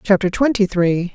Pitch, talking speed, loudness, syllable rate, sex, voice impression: 195 Hz, 155 wpm, -17 LUFS, 4.8 syllables/s, female, very feminine, middle-aged, slightly thin, tensed, powerful, bright, slightly soft, very clear, very fluent, slightly raspy, cool, intellectual, very refreshing, sincere, calm, very friendly, reassuring, very unique, slightly elegant, wild, slightly sweet, very lively, kind, intense, light